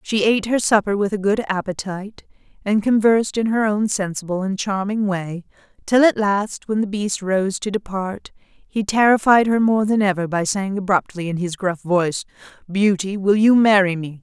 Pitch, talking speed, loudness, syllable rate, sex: 200 Hz, 185 wpm, -19 LUFS, 4.9 syllables/s, female